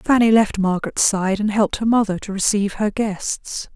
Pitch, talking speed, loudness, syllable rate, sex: 205 Hz, 190 wpm, -19 LUFS, 5.1 syllables/s, female